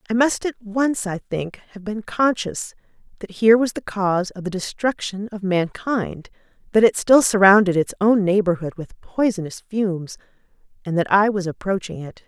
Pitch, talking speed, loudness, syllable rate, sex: 200 Hz, 170 wpm, -20 LUFS, 4.9 syllables/s, female